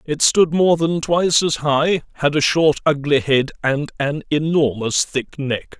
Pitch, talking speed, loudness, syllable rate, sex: 150 Hz, 175 wpm, -18 LUFS, 4.0 syllables/s, male